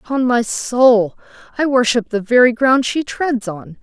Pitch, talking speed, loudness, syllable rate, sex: 240 Hz, 170 wpm, -15 LUFS, 4.2 syllables/s, female